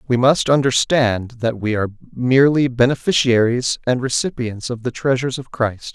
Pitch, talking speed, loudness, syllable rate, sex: 125 Hz, 150 wpm, -18 LUFS, 5.0 syllables/s, male